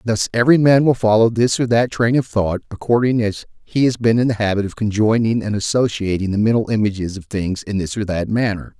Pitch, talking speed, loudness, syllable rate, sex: 110 Hz, 225 wpm, -17 LUFS, 5.7 syllables/s, male